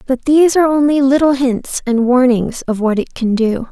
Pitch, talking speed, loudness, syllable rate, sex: 260 Hz, 210 wpm, -14 LUFS, 5.1 syllables/s, female